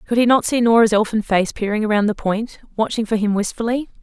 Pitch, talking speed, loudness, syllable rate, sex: 220 Hz, 225 wpm, -18 LUFS, 6.1 syllables/s, female